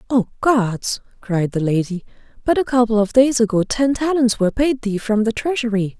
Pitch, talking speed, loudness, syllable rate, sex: 230 Hz, 190 wpm, -18 LUFS, 5.1 syllables/s, female